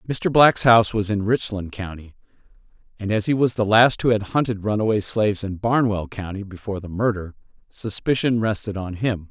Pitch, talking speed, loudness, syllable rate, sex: 105 Hz, 180 wpm, -21 LUFS, 5.4 syllables/s, male